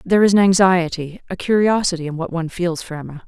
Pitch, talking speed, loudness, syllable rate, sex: 180 Hz, 220 wpm, -18 LUFS, 6.5 syllables/s, female